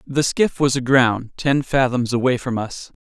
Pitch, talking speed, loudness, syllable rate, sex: 130 Hz, 180 wpm, -19 LUFS, 4.4 syllables/s, male